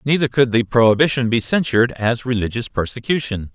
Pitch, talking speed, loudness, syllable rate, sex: 120 Hz, 150 wpm, -18 LUFS, 5.8 syllables/s, male